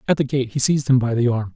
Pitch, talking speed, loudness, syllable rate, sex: 130 Hz, 345 wpm, -19 LUFS, 7.2 syllables/s, male